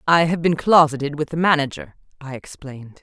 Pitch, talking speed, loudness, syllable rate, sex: 145 Hz, 180 wpm, -18 LUFS, 5.6 syllables/s, female